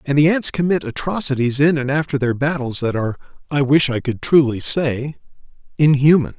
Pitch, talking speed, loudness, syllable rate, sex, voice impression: 140 Hz, 160 wpm, -17 LUFS, 5.4 syllables/s, male, masculine, adult-like, slightly thick, cool, sincere, kind